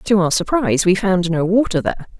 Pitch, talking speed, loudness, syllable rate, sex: 190 Hz, 220 wpm, -17 LUFS, 6.2 syllables/s, female